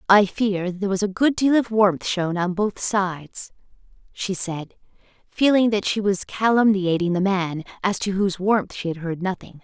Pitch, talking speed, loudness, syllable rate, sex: 195 Hz, 185 wpm, -21 LUFS, 4.6 syllables/s, female